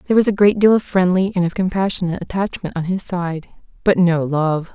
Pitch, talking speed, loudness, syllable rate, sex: 185 Hz, 200 wpm, -18 LUFS, 6.0 syllables/s, female